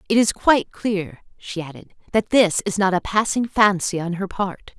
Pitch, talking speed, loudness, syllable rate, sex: 195 Hz, 200 wpm, -20 LUFS, 4.8 syllables/s, female